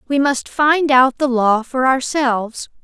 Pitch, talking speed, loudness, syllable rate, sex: 260 Hz, 170 wpm, -16 LUFS, 3.9 syllables/s, female